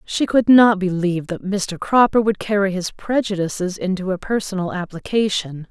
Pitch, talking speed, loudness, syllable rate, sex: 195 Hz, 160 wpm, -19 LUFS, 5.0 syllables/s, female